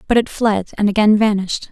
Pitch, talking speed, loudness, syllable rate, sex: 210 Hz, 210 wpm, -16 LUFS, 5.9 syllables/s, female